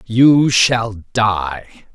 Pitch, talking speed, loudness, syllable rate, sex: 110 Hz, 95 wpm, -15 LUFS, 1.7 syllables/s, male